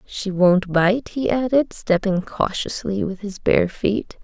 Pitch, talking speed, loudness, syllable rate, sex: 200 Hz, 155 wpm, -20 LUFS, 3.7 syllables/s, female